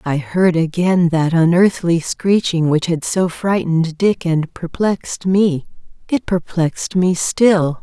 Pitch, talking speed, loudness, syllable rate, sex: 175 Hz, 140 wpm, -16 LUFS, 3.8 syllables/s, female